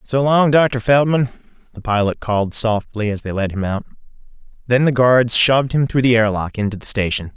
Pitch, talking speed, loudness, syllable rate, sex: 120 Hz, 195 wpm, -17 LUFS, 5.4 syllables/s, male